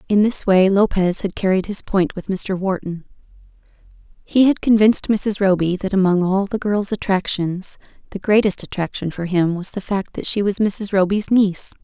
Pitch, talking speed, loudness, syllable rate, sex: 195 Hz, 185 wpm, -18 LUFS, 5.0 syllables/s, female